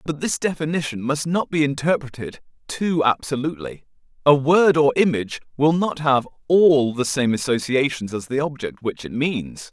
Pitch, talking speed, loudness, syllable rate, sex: 140 Hz, 160 wpm, -20 LUFS, 4.9 syllables/s, male